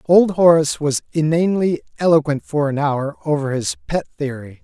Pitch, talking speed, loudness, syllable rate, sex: 150 Hz, 155 wpm, -18 LUFS, 5.2 syllables/s, male